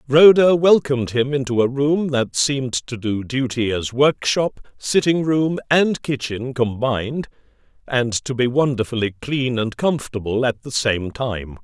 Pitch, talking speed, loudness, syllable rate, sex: 130 Hz, 150 wpm, -19 LUFS, 4.4 syllables/s, male